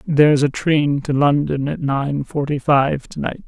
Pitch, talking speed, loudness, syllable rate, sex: 145 Hz, 205 wpm, -18 LUFS, 4.5 syllables/s, female